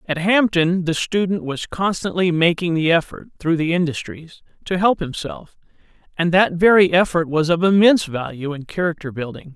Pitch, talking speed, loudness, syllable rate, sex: 170 Hz, 165 wpm, -18 LUFS, 5.1 syllables/s, male